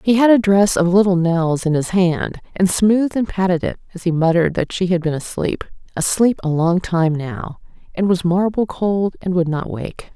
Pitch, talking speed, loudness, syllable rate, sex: 180 Hz, 205 wpm, -17 LUFS, 4.8 syllables/s, female